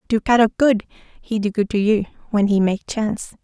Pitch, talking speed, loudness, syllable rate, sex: 215 Hz, 210 wpm, -19 LUFS, 4.9 syllables/s, female